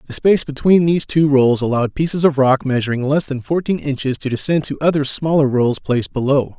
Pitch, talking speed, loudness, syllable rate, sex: 140 Hz, 210 wpm, -16 LUFS, 5.9 syllables/s, male